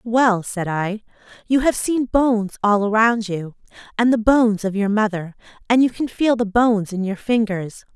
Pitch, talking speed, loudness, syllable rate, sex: 215 Hz, 190 wpm, -19 LUFS, 4.7 syllables/s, female